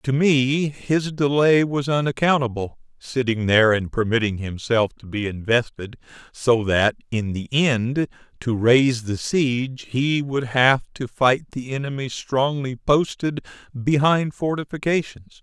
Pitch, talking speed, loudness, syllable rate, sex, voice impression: 130 Hz, 130 wpm, -21 LUFS, 4.2 syllables/s, male, masculine, middle-aged, thick, tensed, clear, fluent, calm, mature, friendly, reassuring, wild, slightly strict